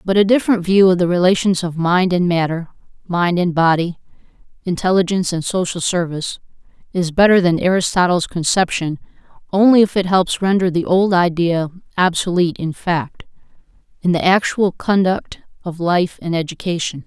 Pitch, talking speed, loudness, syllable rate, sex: 180 Hz, 145 wpm, -17 LUFS, 5.3 syllables/s, female